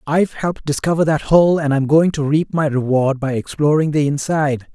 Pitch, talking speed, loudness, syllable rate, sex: 150 Hz, 200 wpm, -17 LUFS, 5.5 syllables/s, male